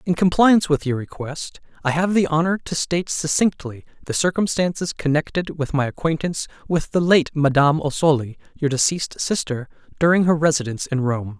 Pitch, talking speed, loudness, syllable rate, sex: 155 Hz, 165 wpm, -20 LUFS, 5.7 syllables/s, male